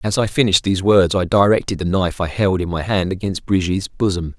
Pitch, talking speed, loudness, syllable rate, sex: 95 Hz, 235 wpm, -18 LUFS, 6.3 syllables/s, male